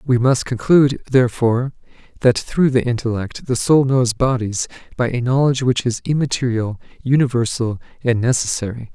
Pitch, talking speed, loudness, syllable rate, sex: 125 Hz, 140 wpm, -18 LUFS, 5.3 syllables/s, male